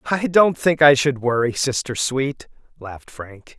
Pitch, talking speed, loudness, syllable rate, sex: 130 Hz, 165 wpm, -18 LUFS, 4.3 syllables/s, male